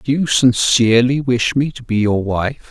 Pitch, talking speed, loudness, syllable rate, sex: 125 Hz, 200 wpm, -15 LUFS, 4.5 syllables/s, male